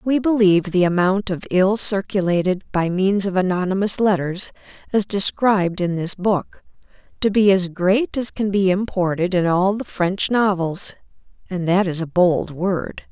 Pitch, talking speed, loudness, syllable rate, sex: 190 Hz, 165 wpm, -19 LUFS, 4.3 syllables/s, female